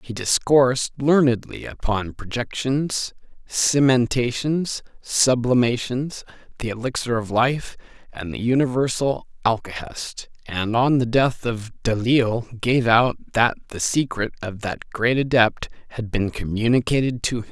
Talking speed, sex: 135 wpm, male